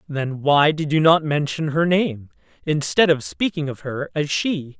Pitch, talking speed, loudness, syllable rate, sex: 150 Hz, 190 wpm, -20 LUFS, 4.3 syllables/s, female